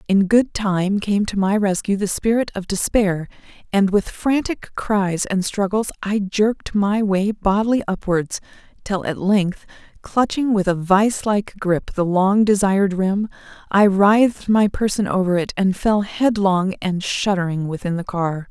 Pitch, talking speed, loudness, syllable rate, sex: 200 Hz, 160 wpm, -19 LUFS, 4.2 syllables/s, female